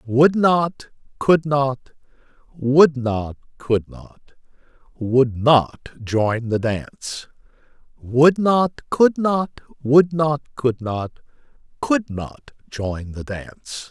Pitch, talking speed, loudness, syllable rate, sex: 135 Hz, 110 wpm, -19 LUFS, 2.8 syllables/s, male